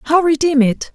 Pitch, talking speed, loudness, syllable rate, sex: 295 Hz, 190 wpm, -15 LUFS, 4.4 syllables/s, female